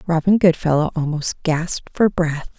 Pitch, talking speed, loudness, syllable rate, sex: 165 Hz, 140 wpm, -19 LUFS, 4.9 syllables/s, female